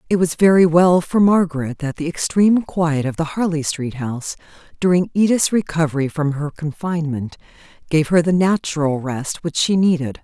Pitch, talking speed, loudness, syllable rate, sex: 160 Hz, 170 wpm, -18 LUFS, 5.2 syllables/s, female